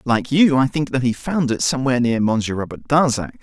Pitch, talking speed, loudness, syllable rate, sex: 125 Hz, 230 wpm, -18 LUFS, 5.7 syllables/s, male